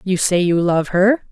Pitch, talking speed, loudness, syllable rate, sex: 185 Hz, 230 wpm, -16 LUFS, 4.3 syllables/s, female